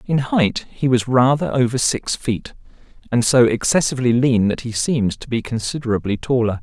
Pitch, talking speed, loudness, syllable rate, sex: 120 Hz, 170 wpm, -18 LUFS, 5.3 syllables/s, male